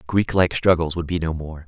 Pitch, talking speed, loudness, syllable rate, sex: 85 Hz, 215 wpm, -21 LUFS, 6.0 syllables/s, male